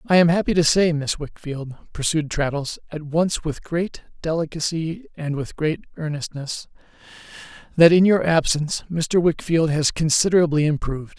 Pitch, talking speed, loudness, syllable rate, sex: 160 Hz, 145 wpm, -21 LUFS, 4.9 syllables/s, male